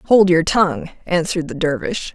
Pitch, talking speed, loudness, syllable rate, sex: 170 Hz, 170 wpm, -17 LUFS, 5.1 syllables/s, female